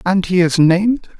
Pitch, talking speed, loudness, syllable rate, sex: 185 Hz, 200 wpm, -14 LUFS, 5.0 syllables/s, male